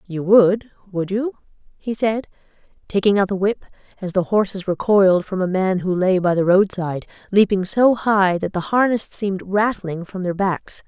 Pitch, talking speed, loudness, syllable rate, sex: 195 Hz, 180 wpm, -19 LUFS, 4.7 syllables/s, female